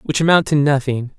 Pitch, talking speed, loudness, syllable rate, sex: 145 Hz, 205 wpm, -16 LUFS, 5.8 syllables/s, male